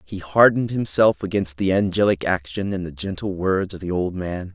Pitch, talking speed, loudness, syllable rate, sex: 95 Hz, 200 wpm, -21 LUFS, 5.2 syllables/s, male